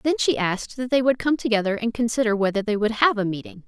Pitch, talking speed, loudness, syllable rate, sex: 225 Hz, 260 wpm, -22 LUFS, 6.5 syllables/s, female